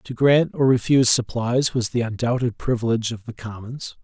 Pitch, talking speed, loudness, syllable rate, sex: 120 Hz, 180 wpm, -20 LUFS, 5.3 syllables/s, male